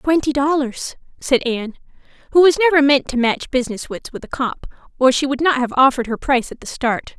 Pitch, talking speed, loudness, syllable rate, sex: 270 Hz, 215 wpm, -17 LUFS, 6.2 syllables/s, female